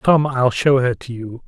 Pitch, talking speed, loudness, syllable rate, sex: 130 Hz, 245 wpm, -17 LUFS, 4.2 syllables/s, male